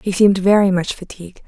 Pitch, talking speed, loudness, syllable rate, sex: 190 Hz, 205 wpm, -15 LUFS, 6.4 syllables/s, female